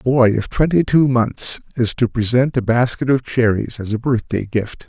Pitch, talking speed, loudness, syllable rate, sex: 120 Hz, 210 wpm, -18 LUFS, 4.8 syllables/s, male